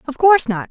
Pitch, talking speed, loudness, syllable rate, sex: 290 Hz, 255 wpm, -14 LUFS, 7.0 syllables/s, female